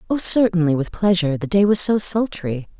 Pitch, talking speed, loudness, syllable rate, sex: 180 Hz, 195 wpm, -18 LUFS, 5.6 syllables/s, female